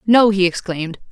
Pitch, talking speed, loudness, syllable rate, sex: 190 Hz, 160 wpm, -17 LUFS, 5.5 syllables/s, female